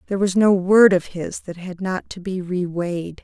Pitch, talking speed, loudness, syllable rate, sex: 185 Hz, 240 wpm, -20 LUFS, 5.0 syllables/s, female